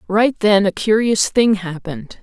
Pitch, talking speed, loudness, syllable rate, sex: 210 Hz, 160 wpm, -16 LUFS, 4.4 syllables/s, female